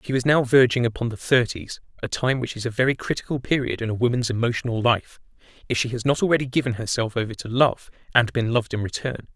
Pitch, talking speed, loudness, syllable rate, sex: 120 Hz, 220 wpm, -23 LUFS, 6.4 syllables/s, male